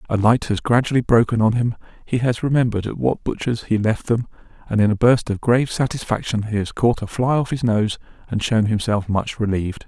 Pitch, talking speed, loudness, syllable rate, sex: 115 Hz, 215 wpm, -20 LUFS, 5.6 syllables/s, male